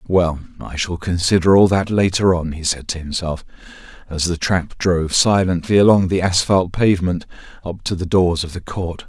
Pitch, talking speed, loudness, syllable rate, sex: 90 Hz, 185 wpm, -17 LUFS, 5.0 syllables/s, male